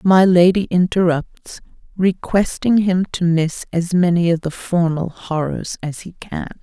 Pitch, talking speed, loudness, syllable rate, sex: 175 Hz, 145 wpm, -18 LUFS, 4.0 syllables/s, female